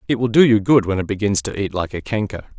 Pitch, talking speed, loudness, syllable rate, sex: 105 Hz, 300 wpm, -18 LUFS, 6.6 syllables/s, male